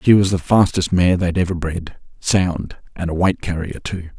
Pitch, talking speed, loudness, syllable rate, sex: 90 Hz, 185 wpm, -19 LUFS, 4.8 syllables/s, male